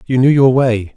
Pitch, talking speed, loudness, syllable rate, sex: 125 Hz, 250 wpm, -12 LUFS, 4.8 syllables/s, male